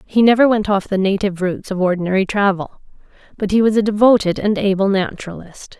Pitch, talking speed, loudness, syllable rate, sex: 200 Hz, 185 wpm, -16 LUFS, 6.4 syllables/s, female